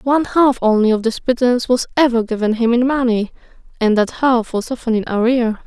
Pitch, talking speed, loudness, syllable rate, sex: 240 Hz, 200 wpm, -16 LUFS, 5.7 syllables/s, female